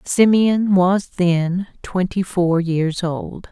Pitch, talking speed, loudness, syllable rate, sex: 185 Hz, 120 wpm, -18 LUFS, 2.8 syllables/s, female